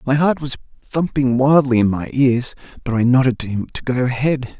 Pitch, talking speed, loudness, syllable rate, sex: 130 Hz, 210 wpm, -18 LUFS, 5.3 syllables/s, male